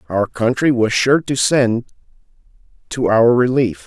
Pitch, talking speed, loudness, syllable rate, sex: 120 Hz, 140 wpm, -16 LUFS, 4.1 syllables/s, male